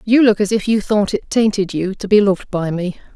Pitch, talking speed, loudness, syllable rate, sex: 200 Hz, 265 wpm, -17 LUFS, 5.6 syllables/s, female